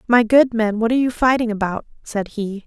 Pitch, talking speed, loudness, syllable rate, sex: 225 Hz, 225 wpm, -18 LUFS, 5.6 syllables/s, female